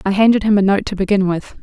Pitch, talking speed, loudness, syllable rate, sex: 200 Hz, 295 wpm, -15 LUFS, 6.8 syllables/s, female